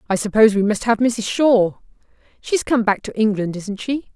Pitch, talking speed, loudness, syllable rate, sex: 220 Hz, 200 wpm, -18 LUFS, 5.1 syllables/s, female